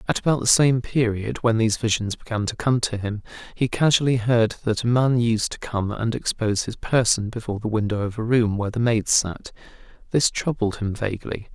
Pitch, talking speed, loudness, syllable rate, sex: 115 Hz, 210 wpm, -22 LUFS, 5.5 syllables/s, male